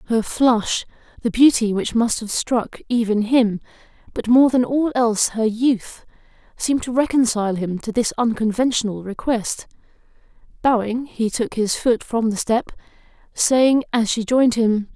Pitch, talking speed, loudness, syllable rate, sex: 230 Hz, 150 wpm, -19 LUFS, 4.5 syllables/s, female